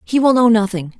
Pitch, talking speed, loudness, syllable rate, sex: 220 Hz, 240 wpm, -14 LUFS, 5.7 syllables/s, female